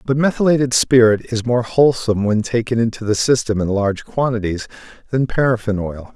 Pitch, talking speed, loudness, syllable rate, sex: 115 Hz, 165 wpm, -17 LUFS, 5.9 syllables/s, male